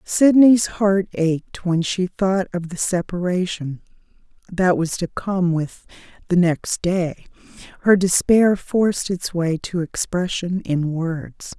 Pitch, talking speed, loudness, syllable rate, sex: 180 Hz, 135 wpm, -20 LUFS, 3.6 syllables/s, female